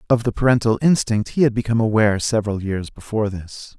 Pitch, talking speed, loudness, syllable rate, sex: 110 Hz, 190 wpm, -19 LUFS, 6.4 syllables/s, male